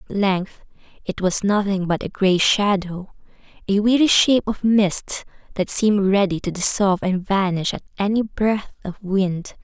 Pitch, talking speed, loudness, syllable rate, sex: 195 Hz, 160 wpm, -19 LUFS, 4.6 syllables/s, female